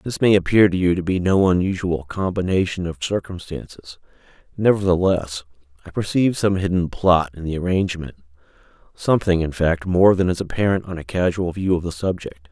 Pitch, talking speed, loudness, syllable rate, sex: 90 Hz, 165 wpm, -20 LUFS, 5.5 syllables/s, male